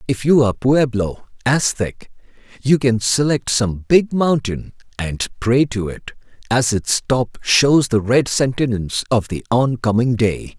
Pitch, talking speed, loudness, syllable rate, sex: 120 Hz, 155 wpm, -17 LUFS, 4.0 syllables/s, male